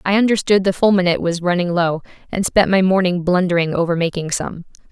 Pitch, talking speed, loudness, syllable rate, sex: 180 Hz, 185 wpm, -17 LUFS, 6.0 syllables/s, female